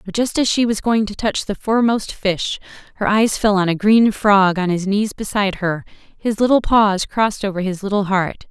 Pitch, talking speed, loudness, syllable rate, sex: 205 Hz, 220 wpm, -17 LUFS, 5.1 syllables/s, female